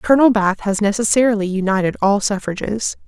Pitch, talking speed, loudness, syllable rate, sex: 210 Hz, 135 wpm, -17 LUFS, 5.8 syllables/s, female